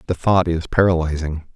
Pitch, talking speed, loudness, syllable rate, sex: 85 Hz, 155 wpm, -19 LUFS, 5.3 syllables/s, male